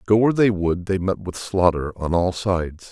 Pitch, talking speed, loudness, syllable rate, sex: 90 Hz, 225 wpm, -21 LUFS, 5.1 syllables/s, male